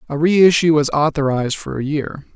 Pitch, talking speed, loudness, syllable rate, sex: 150 Hz, 180 wpm, -16 LUFS, 5.2 syllables/s, male